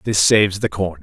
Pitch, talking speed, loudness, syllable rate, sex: 95 Hz, 235 wpm, -16 LUFS, 5.5 syllables/s, male